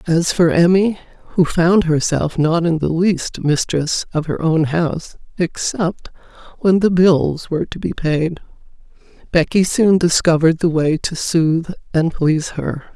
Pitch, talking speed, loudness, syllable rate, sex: 165 Hz, 155 wpm, -17 LUFS, 4.1 syllables/s, female